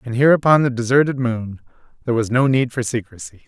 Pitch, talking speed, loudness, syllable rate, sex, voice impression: 125 Hz, 205 wpm, -18 LUFS, 6.5 syllables/s, male, masculine, adult-like, slightly soft, slightly muffled, sincere, calm, slightly mature